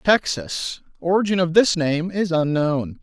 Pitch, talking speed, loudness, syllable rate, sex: 170 Hz, 120 wpm, -20 LUFS, 4.0 syllables/s, male